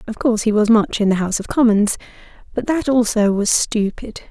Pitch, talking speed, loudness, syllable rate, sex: 225 Hz, 210 wpm, -17 LUFS, 5.7 syllables/s, female